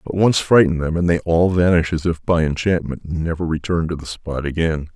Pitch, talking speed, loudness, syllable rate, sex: 85 Hz, 230 wpm, -19 LUFS, 5.4 syllables/s, male